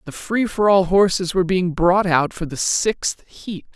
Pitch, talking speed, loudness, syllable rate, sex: 185 Hz, 210 wpm, -18 LUFS, 4.3 syllables/s, female